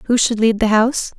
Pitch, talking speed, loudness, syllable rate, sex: 225 Hz, 255 wpm, -16 LUFS, 5.4 syllables/s, female